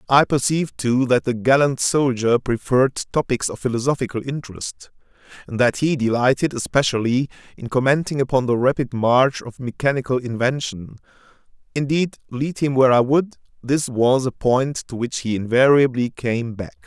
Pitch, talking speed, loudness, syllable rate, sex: 130 Hz, 150 wpm, -20 LUFS, 5.1 syllables/s, male